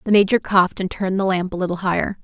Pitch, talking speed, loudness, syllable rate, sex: 190 Hz, 270 wpm, -19 LUFS, 7.2 syllables/s, female